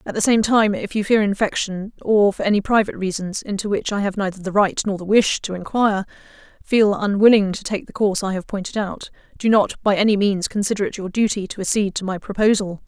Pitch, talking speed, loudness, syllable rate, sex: 200 Hz, 230 wpm, -20 LUFS, 5.0 syllables/s, female